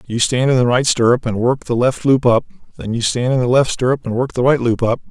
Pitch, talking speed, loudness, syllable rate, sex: 125 Hz, 295 wpm, -16 LUFS, 5.9 syllables/s, male